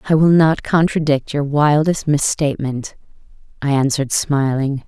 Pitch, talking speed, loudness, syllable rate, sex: 145 Hz, 125 wpm, -17 LUFS, 4.7 syllables/s, female